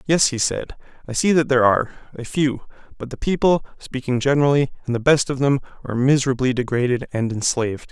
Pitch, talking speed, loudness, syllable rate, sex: 130 Hz, 180 wpm, -20 LUFS, 6.3 syllables/s, male